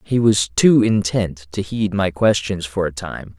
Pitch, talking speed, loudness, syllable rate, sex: 95 Hz, 195 wpm, -18 LUFS, 4.1 syllables/s, male